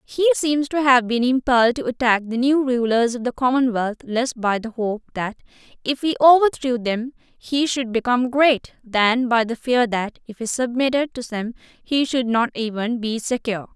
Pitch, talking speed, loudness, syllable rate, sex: 245 Hz, 190 wpm, -20 LUFS, 4.9 syllables/s, female